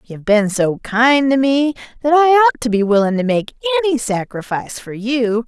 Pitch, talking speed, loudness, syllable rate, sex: 250 Hz, 195 wpm, -16 LUFS, 5.5 syllables/s, female